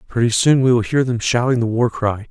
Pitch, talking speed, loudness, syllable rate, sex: 120 Hz, 260 wpm, -17 LUFS, 5.7 syllables/s, male